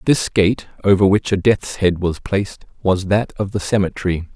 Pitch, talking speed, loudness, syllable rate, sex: 95 Hz, 195 wpm, -18 LUFS, 4.9 syllables/s, male